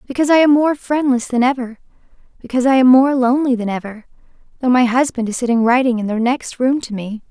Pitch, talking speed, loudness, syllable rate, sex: 250 Hz, 215 wpm, -16 LUFS, 6.4 syllables/s, female